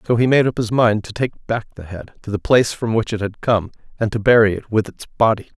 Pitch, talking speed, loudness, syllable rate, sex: 110 Hz, 280 wpm, -18 LUFS, 5.9 syllables/s, male